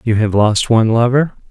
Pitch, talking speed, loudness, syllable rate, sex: 115 Hz, 200 wpm, -13 LUFS, 5.5 syllables/s, male